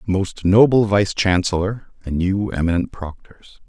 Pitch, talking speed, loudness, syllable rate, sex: 95 Hz, 130 wpm, -18 LUFS, 4.2 syllables/s, male